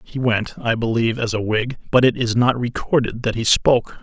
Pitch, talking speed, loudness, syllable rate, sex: 120 Hz, 225 wpm, -19 LUFS, 5.4 syllables/s, male